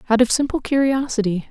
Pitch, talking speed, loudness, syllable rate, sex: 245 Hz, 160 wpm, -19 LUFS, 6.1 syllables/s, female